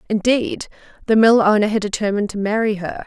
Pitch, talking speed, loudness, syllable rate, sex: 215 Hz, 175 wpm, -17 LUFS, 6.1 syllables/s, female